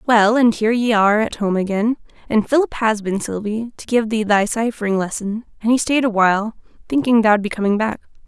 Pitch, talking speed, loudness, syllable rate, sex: 220 Hz, 205 wpm, -18 LUFS, 5.7 syllables/s, female